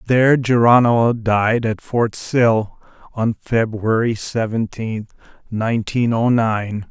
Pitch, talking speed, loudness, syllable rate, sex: 115 Hz, 105 wpm, -18 LUFS, 3.6 syllables/s, male